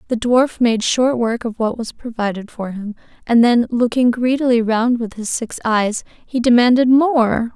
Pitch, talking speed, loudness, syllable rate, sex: 235 Hz, 185 wpm, -17 LUFS, 4.4 syllables/s, female